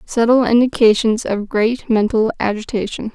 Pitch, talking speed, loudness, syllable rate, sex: 225 Hz, 115 wpm, -16 LUFS, 4.7 syllables/s, female